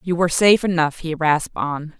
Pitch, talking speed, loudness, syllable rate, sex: 165 Hz, 210 wpm, -19 LUFS, 5.9 syllables/s, female